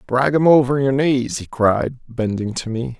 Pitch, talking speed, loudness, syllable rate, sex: 125 Hz, 200 wpm, -18 LUFS, 4.4 syllables/s, male